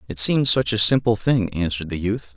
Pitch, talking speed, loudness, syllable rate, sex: 105 Hz, 230 wpm, -19 LUFS, 5.5 syllables/s, male